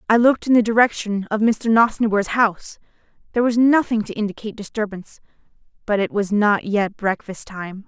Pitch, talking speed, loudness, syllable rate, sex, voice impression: 215 Hz, 160 wpm, -19 LUFS, 5.7 syllables/s, female, very feminine, slightly young, very thin, very tensed, slightly powerful, very bright, slightly hard, very clear, very fluent, slightly raspy, very cute, slightly intellectual, very refreshing, sincere, slightly calm, very friendly, very reassuring, very unique, slightly elegant, wild, slightly sweet, very lively, slightly kind, intense, sharp, light